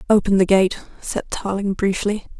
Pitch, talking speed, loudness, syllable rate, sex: 195 Hz, 150 wpm, -20 LUFS, 4.9 syllables/s, female